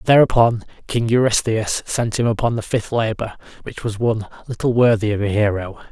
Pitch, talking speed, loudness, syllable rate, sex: 110 Hz, 175 wpm, -19 LUFS, 5.4 syllables/s, male